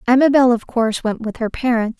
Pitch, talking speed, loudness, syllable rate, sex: 235 Hz, 210 wpm, -17 LUFS, 6.0 syllables/s, female